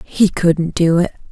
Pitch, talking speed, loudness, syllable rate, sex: 175 Hz, 180 wpm, -15 LUFS, 3.8 syllables/s, female